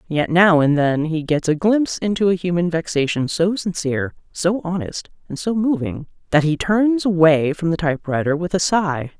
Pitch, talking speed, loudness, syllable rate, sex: 170 Hz, 190 wpm, -19 LUFS, 5.0 syllables/s, female